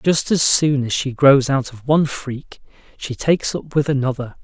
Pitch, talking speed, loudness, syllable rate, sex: 140 Hz, 205 wpm, -17 LUFS, 4.8 syllables/s, male